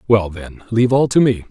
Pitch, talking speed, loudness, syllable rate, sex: 110 Hz, 240 wpm, -16 LUFS, 5.7 syllables/s, male